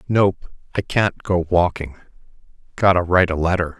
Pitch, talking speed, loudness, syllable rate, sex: 90 Hz, 140 wpm, -19 LUFS, 4.9 syllables/s, male